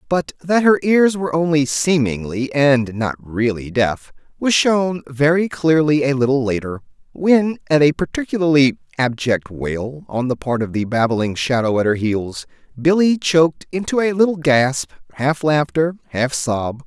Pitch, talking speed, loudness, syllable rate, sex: 140 Hz, 155 wpm, -18 LUFS, 4.4 syllables/s, male